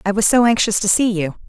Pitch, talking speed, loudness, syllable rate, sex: 210 Hz, 285 wpm, -16 LUFS, 6.3 syllables/s, female